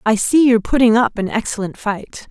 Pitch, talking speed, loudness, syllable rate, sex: 225 Hz, 210 wpm, -16 LUFS, 5.4 syllables/s, female